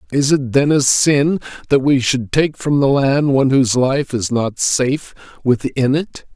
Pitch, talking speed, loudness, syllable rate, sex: 135 Hz, 190 wpm, -16 LUFS, 4.4 syllables/s, male